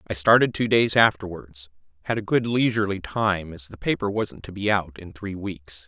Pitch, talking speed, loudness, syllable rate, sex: 100 Hz, 205 wpm, -23 LUFS, 5.1 syllables/s, male